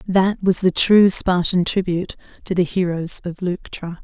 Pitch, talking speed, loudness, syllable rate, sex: 180 Hz, 165 wpm, -18 LUFS, 4.5 syllables/s, female